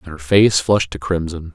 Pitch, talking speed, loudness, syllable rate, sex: 85 Hz, 195 wpm, -17 LUFS, 4.6 syllables/s, male